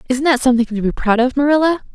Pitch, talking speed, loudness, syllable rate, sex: 260 Hz, 245 wpm, -15 LUFS, 7.4 syllables/s, female